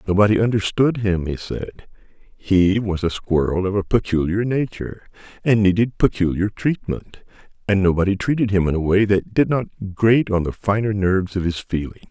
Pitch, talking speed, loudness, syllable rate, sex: 100 Hz, 170 wpm, -20 LUFS, 5.3 syllables/s, male